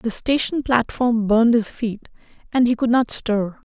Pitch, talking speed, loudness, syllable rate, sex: 230 Hz, 175 wpm, -20 LUFS, 4.4 syllables/s, female